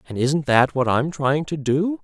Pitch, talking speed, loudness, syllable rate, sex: 145 Hz, 235 wpm, -20 LUFS, 4.4 syllables/s, male